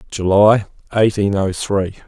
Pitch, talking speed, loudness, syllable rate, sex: 100 Hz, 115 wpm, -16 LUFS, 4.0 syllables/s, male